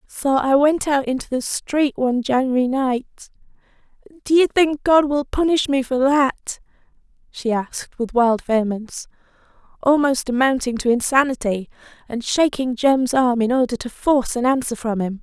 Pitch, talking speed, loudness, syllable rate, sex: 260 Hz, 155 wpm, -19 LUFS, 4.8 syllables/s, female